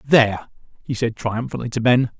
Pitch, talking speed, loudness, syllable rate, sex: 120 Hz, 165 wpm, -20 LUFS, 5.1 syllables/s, male